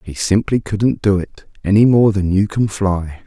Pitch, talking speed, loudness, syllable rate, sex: 100 Hz, 200 wpm, -16 LUFS, 4.3 syllables/s, male